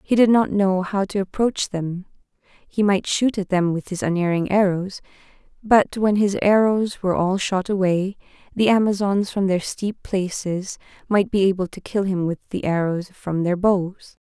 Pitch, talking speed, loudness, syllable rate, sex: 195 Hz, 180 wpm, -21 LUFS, 4.5 syllables/s, female